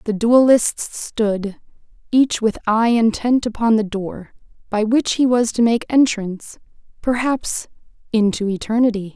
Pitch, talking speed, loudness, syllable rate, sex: 225 Hz, 130 wpm, -18 LUFS, 4.2 syllables/s, female